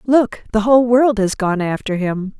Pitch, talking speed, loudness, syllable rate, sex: 220 Hz, 200 wpm, -16 LUFS, 4.7 syllables/s, female